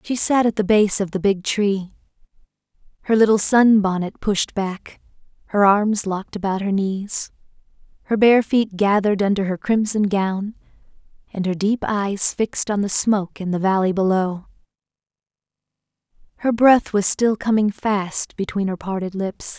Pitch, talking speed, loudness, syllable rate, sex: 200 Hz, 150 wpm, -19 LUFS, 4.6 syllables/s, female